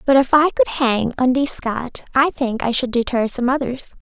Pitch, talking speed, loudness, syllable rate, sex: 260 Hz, 210 wpm, -18 LUFS, 4.8 syllables/s, female